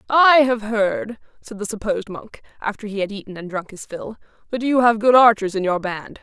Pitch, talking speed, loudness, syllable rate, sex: 215 Hz, 220 wpm, -19 LUFS, 5.3 syllables/s, female